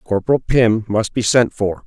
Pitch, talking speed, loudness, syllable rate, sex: 115 Hz, 195 wpm, -17 LUFS, 4.7 syllables/s, male